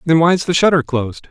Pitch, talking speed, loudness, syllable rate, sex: 160 Hz, 230 wpm, -15 LUFS, 5.8 syllables/s, male